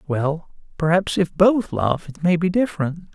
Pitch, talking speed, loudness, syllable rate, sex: 170 Hz, 170 wpm, -20 LUFS, 4.5 syllables/s, male